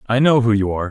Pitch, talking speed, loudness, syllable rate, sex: 115 Hz, 330 wpm, -16 LUFS, 8.2 syllables/s, male